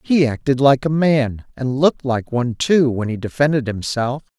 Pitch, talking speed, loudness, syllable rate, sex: 130 Hz, 190 wpm, -18 LUFS, 4.9 syllables/s, male